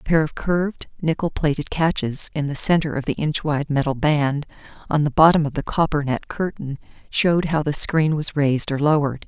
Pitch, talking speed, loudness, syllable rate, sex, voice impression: 150 Hz, 200 wpm, -21 LUFS, 5.5 syllables/s, female, feminine, adult-like, tensed, slightly powerful, clear, fluent, intellectual, calm, reassuring, elegant, kind, slightly modest